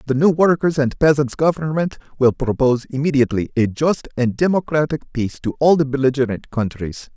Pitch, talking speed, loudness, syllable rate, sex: 140 Hz, 160 wpm, -18 LUFS, 5.6 syllables/s, male